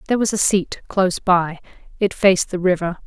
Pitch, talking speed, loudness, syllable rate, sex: 185 Hz, 195 wpm, -19 LUFS, 5.9 syllables/s, female